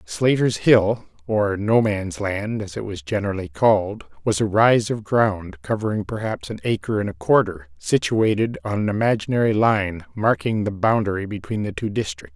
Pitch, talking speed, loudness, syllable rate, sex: 110 Hz, 170 wpm, -21 LUFS, 4.8 syllables/s, male